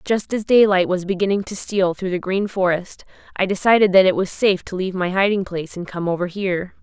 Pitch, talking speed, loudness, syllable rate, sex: 190 Hz, 230 wpm, -19 LUFS, 6.0 syllables/s, female